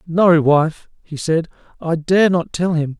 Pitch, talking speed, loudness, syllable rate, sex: 165 Hz, 180 wpm, -17 LUFS, 3.7 syllables/s, male